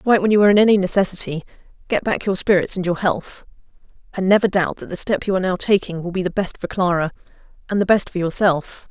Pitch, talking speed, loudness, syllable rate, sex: 190 Hz, 220 wpm, -19 LUFS, 6.6 syllables/s, female